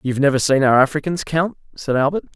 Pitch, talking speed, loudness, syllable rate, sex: 145 Hz, 230 wpm, -18 LUFS, 6.5 syllables/s, male